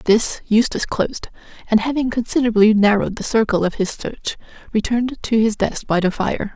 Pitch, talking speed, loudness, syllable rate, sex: 220 Hz, 175 wpm, -19 LUFS, 5.6 syllables/s, female